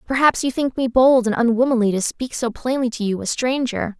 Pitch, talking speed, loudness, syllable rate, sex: 245 Hz, 225 wpm, -19 LUFS, 5.5 syllables/s, female